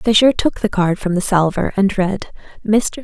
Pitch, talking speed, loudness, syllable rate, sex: 200 Hz, 200 wpm, -17 LUFS, 4.6 syllables/s, female